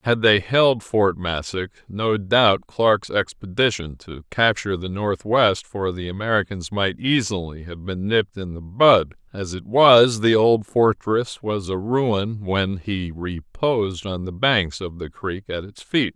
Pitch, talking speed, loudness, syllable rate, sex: 100 Hz, 165 wpm, -20 LUFS, 3.9 syllables/s, male